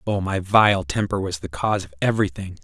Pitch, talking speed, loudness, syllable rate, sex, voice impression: 95 Hz, 205 wpm, -21 LUFS, 5.8 syllables/s, male, very masculine, very adult-like, middle-aged, thick, very tensed, powerful, very bright, slightly soft, clear, very fluent, slightly raspy, cool, very intellectual, refreshing, calm, friendly, reassuring, very unique, slightly elegant, wild, slightly sweet, lively, slightly intense